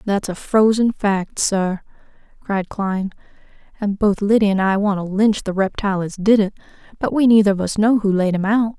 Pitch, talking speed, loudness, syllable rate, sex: 205 Hz, 205 wpm, -18 LUFS, 5.2 syllables/s, female